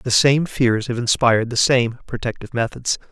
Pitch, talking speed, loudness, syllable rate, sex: 120 Hz, 175 wpm, -19 LUFS, 5.2 syllables/s, male